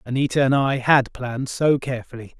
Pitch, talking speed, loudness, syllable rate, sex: 130 Hz, 175 wpm, -20 LUFS, 5.8 syllables/s, male